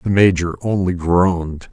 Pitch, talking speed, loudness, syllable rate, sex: 90 Hz, 140 wpm, -17 LUFS, 4.4 syllables/s, male